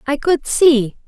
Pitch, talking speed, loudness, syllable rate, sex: 280 Hz, 170 wpm, -15 LUFS, 3.5 syllables/s, female